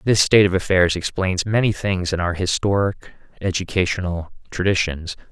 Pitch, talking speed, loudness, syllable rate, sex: 95 Hz, 135 wpm, -20 LUFS, 5.2 syllables/s, male